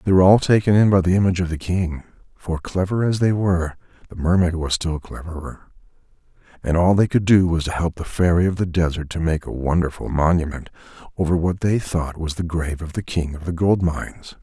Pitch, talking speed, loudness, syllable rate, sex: 85 Hz, 225 wpm, -20 LUFS, 5.9 syllables/s, male